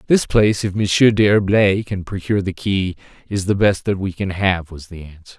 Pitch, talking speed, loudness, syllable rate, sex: 95 Hz, 210 wpm, -18 LUFS, 5.1 syllables/s, male